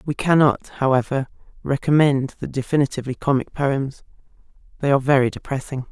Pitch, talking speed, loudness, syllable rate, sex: 135 Hz, 120 wpm, -20 LUFS, 5.6 syllables/s, female